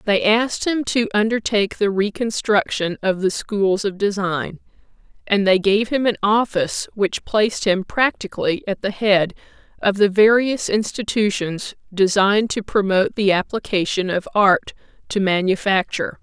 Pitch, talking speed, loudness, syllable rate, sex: 205 Hz, 140 wpm, -19 LUFS, 4.7 syllables/s, female